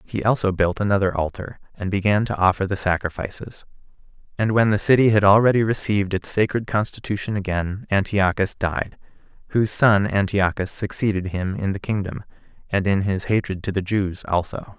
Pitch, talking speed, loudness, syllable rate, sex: 100 Hz, 160 wpm, -21 LUFS, 5.4 syllables/s, male